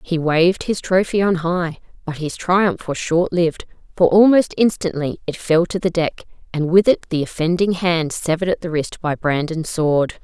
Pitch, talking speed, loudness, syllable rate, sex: 170 Hz, 190 wpm, -18 LUFS, 4.8 syllables/s, female